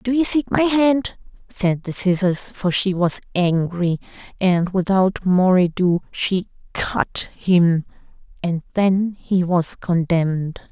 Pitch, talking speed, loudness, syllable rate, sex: 190 Hz, 135 wpm, -19 LUFS, 3.4 syllables/s, female